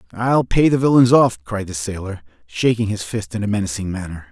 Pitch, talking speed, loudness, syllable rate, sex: 105 Hz, 210 wpm, -18 LUFS, 5.4 syllables/s, male